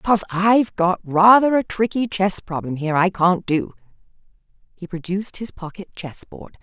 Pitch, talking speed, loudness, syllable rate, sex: 190 Hz, 165 wpm, -19 LUFS, 5.2 syllables/s, female